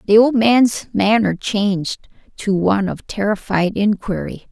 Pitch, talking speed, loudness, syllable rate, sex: 205 Hz, 135 wpm, -17 LUFS, 4.3 syllables/s, female